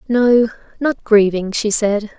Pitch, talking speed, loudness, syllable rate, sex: 220 Hz, 135 wpm, -16 LUFS, 3.7 syllables/s, female